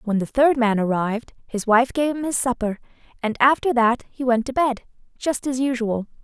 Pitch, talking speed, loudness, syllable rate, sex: 245 Hz, 200 wpm, -21 LUFS, 5.2 syllables/s, female